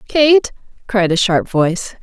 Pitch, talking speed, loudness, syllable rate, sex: 210 Hz, 150 wpm, -14 LUFS, 4.0 syllables/s, female